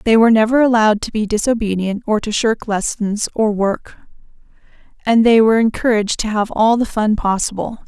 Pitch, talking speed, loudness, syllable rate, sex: 220 Hz, 175 wpm, -16 LUFS, 5.7 syllables/s, female